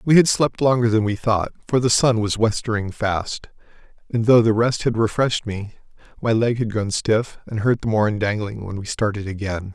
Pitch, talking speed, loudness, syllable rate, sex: 110 Hz, 215 wpm, -20 LUFS, 5.1 syllables/s, male